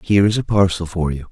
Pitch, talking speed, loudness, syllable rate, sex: 90 Hz, 275 wpm, -18 LUFS, 6.9 syllables/s, male